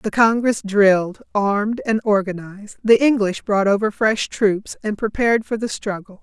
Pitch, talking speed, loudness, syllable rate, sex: 210 Hz, 165 wpm, -19 LUFS, 4.8 syllables/s, female